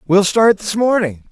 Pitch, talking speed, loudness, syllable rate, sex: 195 Hz, 185 wpm, -14 LUFS, 4.4 syllables/s, male